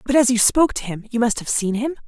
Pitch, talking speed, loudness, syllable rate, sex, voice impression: 240 Hz, 320 wpm, -19 LUFS, 6.5 syllables/s, female, feminine, adult-like, slightly thin, slightly tensed, powerful, bright, soft, raspy, intellectual, friendly, elegant, lively